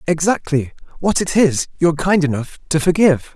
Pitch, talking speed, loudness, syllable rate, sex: 160 Hz, 160 wpm, -17 LUFS, 5.4 syllables/s, male